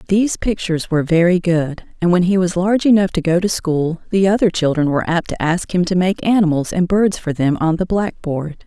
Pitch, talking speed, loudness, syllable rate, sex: 175 Hz, 230 wpm, -17 LUFS, 5.6 syllables/s, female